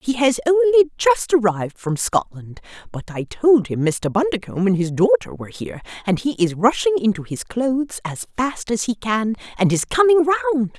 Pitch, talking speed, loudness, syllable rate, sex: 230 Hz, 190 wpm, -19 LUFS, 5.5 syllables/s, female